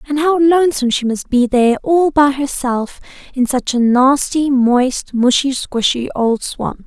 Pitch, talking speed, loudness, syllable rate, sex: 265 Hz, 165 wpm, -15 LUFS, 4.3 syllables/s, female